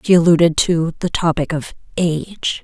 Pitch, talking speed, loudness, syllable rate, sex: 165 Hz, 160 wpm, -17 LUFS, 5.0 syllables/s, female